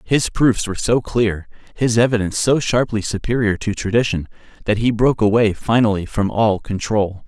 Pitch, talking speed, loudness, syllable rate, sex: 110 Hz, 165 wpm, -18 LUFS, 5.2 syllables/s, male